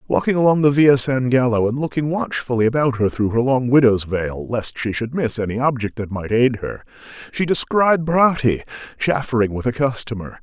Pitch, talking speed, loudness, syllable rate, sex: 125 Hz, 190 wpm, -18 LUFS, 5.2 syllables/s, male